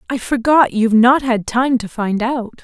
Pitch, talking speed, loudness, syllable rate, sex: 240 Hz, 205 wpm, -15 LUFS, 4.6 syllables/s, female